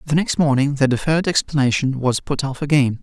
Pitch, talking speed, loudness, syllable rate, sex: 140 Hz, 200 wpm, -19 LUFS, 6.0 syllables/s, male